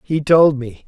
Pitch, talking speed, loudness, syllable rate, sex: 145 Hz, 205 wpm, -14 LUFS, 3.9 syllables/s, male